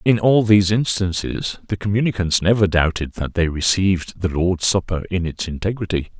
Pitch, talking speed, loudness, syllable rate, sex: 95 Hz, 165 wpm, -19 LUFS, 5.3 syllables/s, male